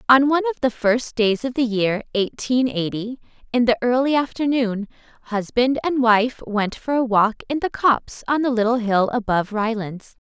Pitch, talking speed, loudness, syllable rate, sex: 240 Hz, 180 wpm, -20 LUFS, 5.0 syllables/s, female